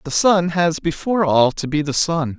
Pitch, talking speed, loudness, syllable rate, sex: 165 Hz, 225 wpm, -18 LUFS, 4.9 syllables/s, male